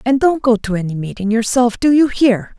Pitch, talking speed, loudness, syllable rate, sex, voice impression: 235 Hz, 230 wpm, -15 LUFS, 5.2 syllables/s, female, feminine, adult-like, tensed, slightly hard, slightly muffled, fluent, intellectual, calm, friendly, reassuring, elegant, kind, modest